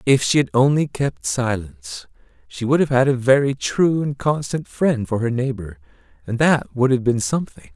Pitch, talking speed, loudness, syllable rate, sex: 125 Hz, 195 wpm, -19 LUFS, 4.9 syllables/s, male